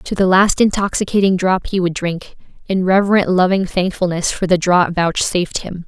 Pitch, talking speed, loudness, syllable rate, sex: 185 Hz, 175 wpm, -16 LUFS, 5.1 syllables/s, female